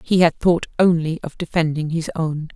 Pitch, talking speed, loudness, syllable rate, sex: 165 Hz, 190 wpm, -20 LUFS, 4.9 syllables/s, female